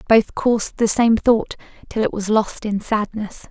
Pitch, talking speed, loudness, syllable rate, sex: 215 Hz, 190 wpm, -19 LUFS, 4.5 syllables/s, female